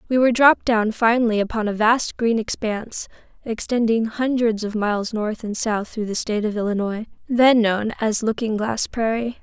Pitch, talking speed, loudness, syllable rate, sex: 225 Hz, 180 wpm, -21 LUFS, 5.2 syllables/s, female